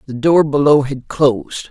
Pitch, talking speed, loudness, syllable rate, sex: 140 Hz, 175 wpm, -15 LUFS, 4.5 syllables/s, male